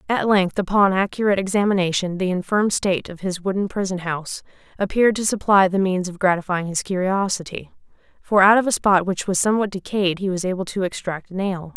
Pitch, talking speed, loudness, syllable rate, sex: 190 Hz, 195 wpm, -20 LUFS, 6.0 syllables/s, female